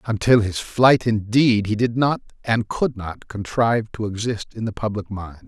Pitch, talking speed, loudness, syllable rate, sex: 110 Hz, 185 wpm, -21 LUFS, 4.6 syllables/s, male